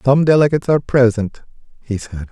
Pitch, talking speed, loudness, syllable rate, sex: 130 Hz, 155 wpm, -16 LUFS, 6.2 syllables/s, male